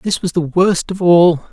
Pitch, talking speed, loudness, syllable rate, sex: 175 Hz, 235 wpm, -14 LUFS, 4.1 syllables/s, male